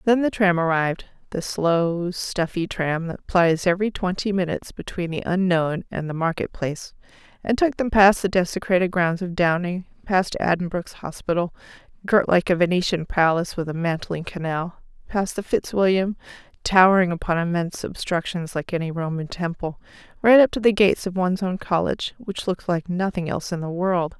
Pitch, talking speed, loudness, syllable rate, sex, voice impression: 180 Hz, 165 wpm, -22 LUFS, 5.4 syllables/s, female, feminine, middle-aged, tensed, powerful, clear, fluent, intellectual, calm, slightly friendly, slightly reassuring, elegant, lively, kind